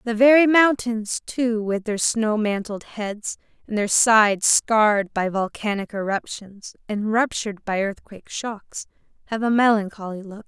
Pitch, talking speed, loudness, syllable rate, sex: 215 Hz, 145 wpm, -21 LUFS, 4.3 syllables/s, female